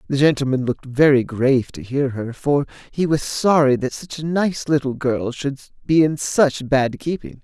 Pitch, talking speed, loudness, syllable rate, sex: 140 Hz, 195 wpm, -19 LUFS, 4.8 syllables/s, male